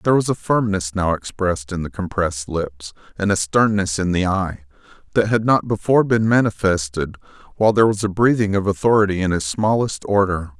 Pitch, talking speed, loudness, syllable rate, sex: 100 Hz, 185 wpm, -19 LUFS, 5.7 syllables/s, male